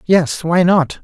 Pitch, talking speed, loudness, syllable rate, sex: 170 Hz, 175 wpm, -14 LUFS, 3.3 syllables/s, male